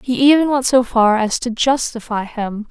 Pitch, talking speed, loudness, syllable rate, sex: 240 Hz, 200 wpm, -16 LUFS, 4.6 syllables/s, female